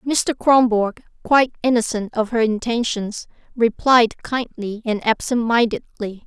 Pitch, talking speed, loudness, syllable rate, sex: 230 Hz, 115 wpm, -19 LUFS, 4.3 syllables/s, female